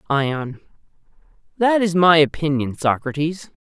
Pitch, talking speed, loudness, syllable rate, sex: 155 Hz, 100 wpm, -19 LUFS, 4.2 syllables/s, male